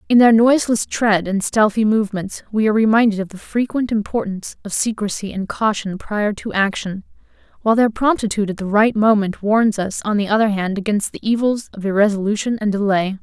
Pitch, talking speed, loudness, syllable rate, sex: 210 Hz, 185 wpm, -18 LUFS, 5.7 syllables/s, female